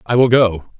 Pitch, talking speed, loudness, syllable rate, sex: 110 Hz, 225 wpm, -14 LUFS, 4.6 syllables/s, male